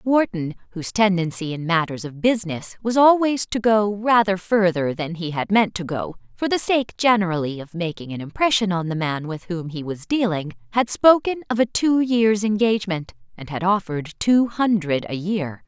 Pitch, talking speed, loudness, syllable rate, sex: 195 Hz, 190 wpm, -21 LUFS, 5.0 syllables/s, female